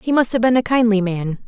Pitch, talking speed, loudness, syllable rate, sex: 225 Hz, 285 wpm, -17 LUFS, 5.6 syllables/s, female